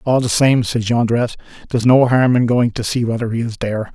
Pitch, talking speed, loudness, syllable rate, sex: 120 Hz, 245 wpm, -16 LUFS, 6.2 syllables/s, male